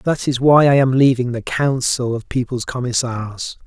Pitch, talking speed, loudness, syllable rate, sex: 125 Hz, 180 wpm, -17 LUFS, 4.5 syllables/s, male